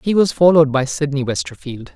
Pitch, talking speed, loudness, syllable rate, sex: 150 Hz, 185 wpm, -16 LUFS, 6.0 syllables/s, male